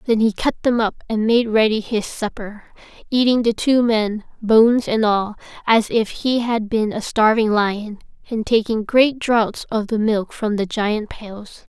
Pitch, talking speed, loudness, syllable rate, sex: 220 Hz, 185 wpm, -18 LUFS, 4.2 syllables/s, female